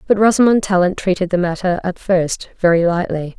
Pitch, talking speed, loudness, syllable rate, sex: 185 Hz, 175 wpm, -16 LUFS, 5.4 syllables/s, female